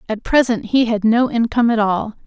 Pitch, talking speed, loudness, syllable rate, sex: 225 Hz, 210 wpm, -17 LUFS, 5.6 syllables/s, female